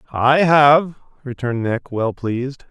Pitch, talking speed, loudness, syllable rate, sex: 130 Hz, 135 wpm, -17 LUFS, 4.2 syllables/s, male